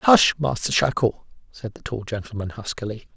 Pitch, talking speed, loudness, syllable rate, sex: 115 Hz, 150 wpm, -23 LUFS, 5.2 syllables/s, male